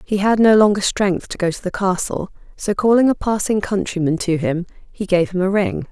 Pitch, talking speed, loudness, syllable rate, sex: 195 Hz, 225 wpm, -18 LUFS, 5.2 syllables/s, female